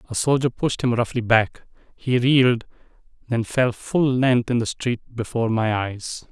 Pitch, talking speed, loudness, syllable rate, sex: 120 Hz, 170 wpm, -21 LUFS, 4.5 syllables/s, male